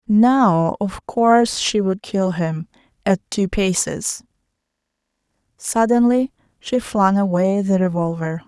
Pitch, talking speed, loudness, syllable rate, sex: 200 Hz, 115 wpm, -18 LUFS, 3.7 syllables/s, female